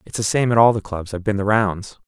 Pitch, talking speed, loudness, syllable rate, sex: 105 Hz, 315 wpm, -19 LUFS, 6.3 syllables/s, male